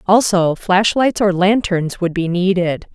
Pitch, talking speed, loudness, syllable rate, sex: 185 Hz, 145 wpm, -16 LUFS, 4.0 syllables/s, female